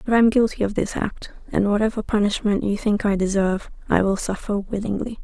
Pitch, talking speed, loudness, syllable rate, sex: 205 Hz, 205 wpm, -22 LUFS, 5.9 syllables/s, female